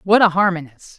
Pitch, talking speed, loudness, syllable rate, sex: 180 Hz, 185 wpm, -16 LUFS, 5.6 syllables/s, female